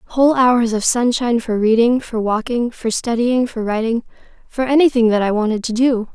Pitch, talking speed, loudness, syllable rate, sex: 235 Hz, 185 wpm, -17 LUFS, 5.3 syllables/s, female